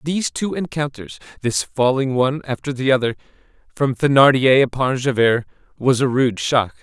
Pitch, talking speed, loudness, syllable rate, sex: 130 Hz, 150 wpm, -18 LUFS, 5.1 syllables/s, male